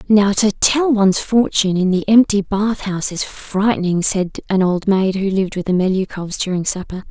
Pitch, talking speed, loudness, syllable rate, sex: 195 Hz, 185 wpm, -17 LUFS, 5.1 syllables/s, female